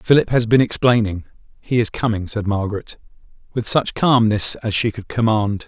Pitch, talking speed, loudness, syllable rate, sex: 110 Hz, 160 wpm, -18 LUFS, 5.0 syllables/s, male